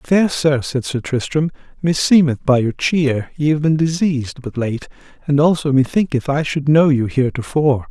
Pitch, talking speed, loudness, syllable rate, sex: 140 Hz, 175 wpm, -17 LUFS, 4.9 syllables/s, male